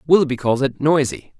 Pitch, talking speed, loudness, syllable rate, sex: 140 Hz, 170 wpm, -18 LUFS, 5.7 syllables/s, male